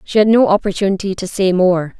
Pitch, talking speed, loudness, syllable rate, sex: 190 Hz, 210 wpm, -15 LUFS, 5.9 syllables/s, female